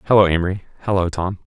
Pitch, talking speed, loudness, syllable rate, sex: 95 Hz, 120 wpm, -19 LUFS, 7.0 syllables/s, male